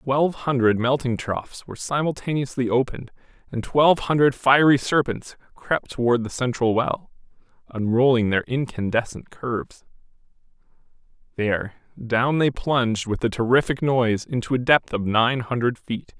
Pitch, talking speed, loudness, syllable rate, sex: 125 Hz, 135 wpm, -22 LUFS, 4.9 syllables/s, male